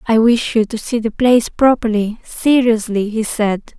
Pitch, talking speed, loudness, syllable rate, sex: 225 Hz, 175 wpm, -15 LUFS, 4.5 syllables/s, female